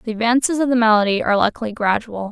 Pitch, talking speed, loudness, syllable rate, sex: 225 Hz, 205 wpm, -17 LUFS, 7.1 syllables/s, female